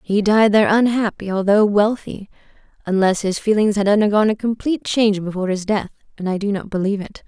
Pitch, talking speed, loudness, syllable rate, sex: 205 Hz, 190 wpm, -18 LUFS, 6.3 syllables/s, female